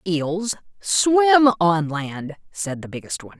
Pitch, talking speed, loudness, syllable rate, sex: 180 Hz, 140 wpm, -20 LUFS, 3.5 syllables/s, female